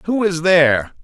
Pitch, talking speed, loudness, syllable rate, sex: 165 Hz, 175 wpm, -15 LUFS, 4.9 syllables/s, male